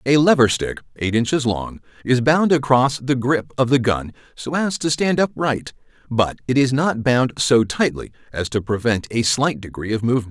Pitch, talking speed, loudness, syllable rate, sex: 125 Hz, 200 wpm, -19 LUFS, 5.0 syllables/s, male